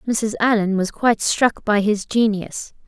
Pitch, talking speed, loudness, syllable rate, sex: 215 Hz, 165 wpm, -19 LUFS, 4.3 syllables/s, female